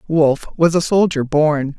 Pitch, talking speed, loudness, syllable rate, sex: 155 Hz, 170 wpm, -16 LUFS, 4.6 syllables/s, female